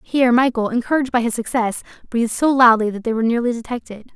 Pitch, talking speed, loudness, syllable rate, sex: 240 Hz, 200 wpm, -18 LUFS, 7.0 syllables/s, female